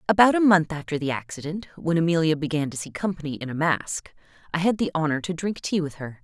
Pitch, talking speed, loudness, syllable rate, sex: 165 Hz, 230 wpm, -24 LUFS, 6.2 syllables/s, female